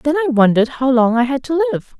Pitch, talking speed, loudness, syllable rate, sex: 275 Hz, 270 wpm, -15 LUFS, 6.3 syllables/s, female